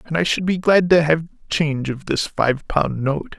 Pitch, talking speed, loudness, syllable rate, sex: 155 Hz, 230 wpm, -19 LUFS, 4.5 syllables/s, male